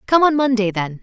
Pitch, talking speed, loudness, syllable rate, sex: 235 Hz, 235 wpm, -17 LUFS, 5.6 syllables/s, female